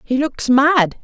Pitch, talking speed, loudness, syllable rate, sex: 270 Hz, 175 wpm, -15 LUFS, 3.2 syllables/s, female